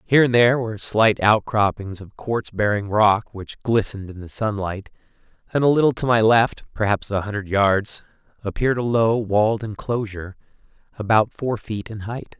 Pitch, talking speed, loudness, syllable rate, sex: 110 Hz, 170 wpm, -20 LUFS, 5.1 syllables/s, male